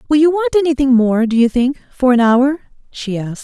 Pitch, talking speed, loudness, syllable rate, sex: 260 Hz, 225 wpm, -14 LUFS, 5.9 syllables/s, female